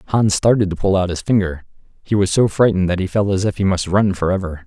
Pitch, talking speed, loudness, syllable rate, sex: 95 Hz, 270 wpm, -17 LUFS, 6.1 syllables/s, male